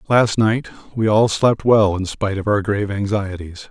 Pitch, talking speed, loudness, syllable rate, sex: 105 Hz, 195 wpm, -18 LUFS, 4.9 syllables/s, male